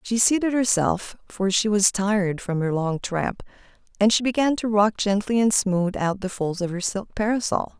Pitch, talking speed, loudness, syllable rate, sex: 205 Hz, 200 wpm, -22 LUFS, 4.8 syllables/s, female